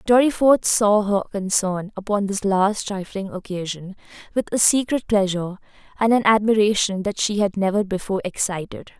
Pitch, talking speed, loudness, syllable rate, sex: 205 Hz, 145 wpm, -20 LUFS, 5.1 syllables/s, female